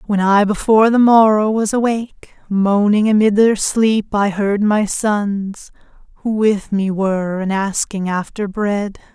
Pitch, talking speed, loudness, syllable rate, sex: 205 Hz, 150 wpm, -16 LUFS, 4.0 syllables/s, female